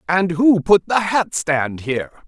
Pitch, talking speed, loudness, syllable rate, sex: 175 Hz, 185 wpm, -17 LUFS, 4.2 syllables/s, male